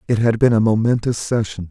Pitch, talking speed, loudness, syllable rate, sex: 110 Hz, 210 wpm, -17 LUFS, 5.8 syllables/s, male